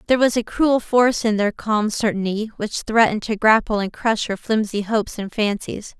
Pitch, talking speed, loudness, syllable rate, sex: 215 Hz, 200 wpm, -20 LUFS, 5.3 syllables/s, female